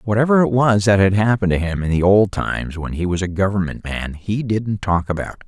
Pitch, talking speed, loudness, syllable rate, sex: 100 Hz, 240 wpm, -18 LUFS, 5.6 syllables/s, male